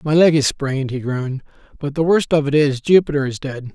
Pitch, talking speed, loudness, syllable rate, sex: 145 Hz, 240 wpm, -18 LUFS, 5.8 syllables/s, male